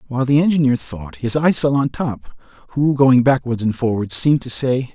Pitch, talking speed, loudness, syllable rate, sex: 130 Hz, 205 wpm, -17 LUFS, 5.3 syllables/s, male